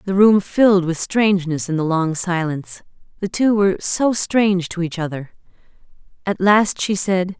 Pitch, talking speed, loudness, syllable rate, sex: 185 Hz, 160 wpm, -18 LUFS, 4.9 syllables/s, female